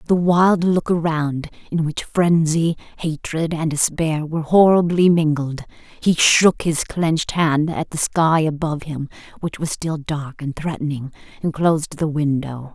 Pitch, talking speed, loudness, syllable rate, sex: 160 Hz, 160 wpm, -19 LUFS, 4.4 syllables/s, female